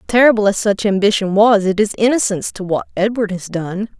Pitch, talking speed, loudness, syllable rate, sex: 205 Hz, 195 wpm, -16 LUFS, 5.7 syllables/s, female